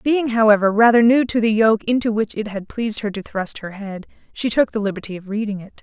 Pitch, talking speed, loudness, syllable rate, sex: 215 Hz, 245 wpm, -19 LUFS, 5.9 syllables/s, female